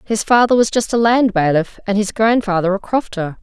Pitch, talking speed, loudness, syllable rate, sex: 210 Hz, 210 wpm, -16 LUFS, 5.3 syllables/s, female